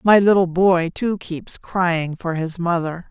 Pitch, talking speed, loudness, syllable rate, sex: 175 Hz, 175 wpm, -19 LUFS, 3.7 syllables/s, female